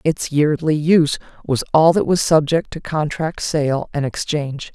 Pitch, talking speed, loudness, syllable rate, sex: 155 Hz, 165 wpm, -18 LUFS, 4.5 syllables/s, female